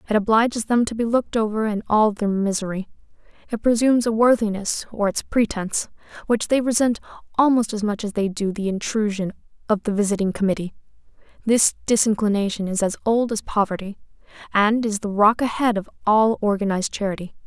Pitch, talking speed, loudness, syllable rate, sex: 215 Hz, 170 wpm, -21 LUFS, 5.8 syllables/s, female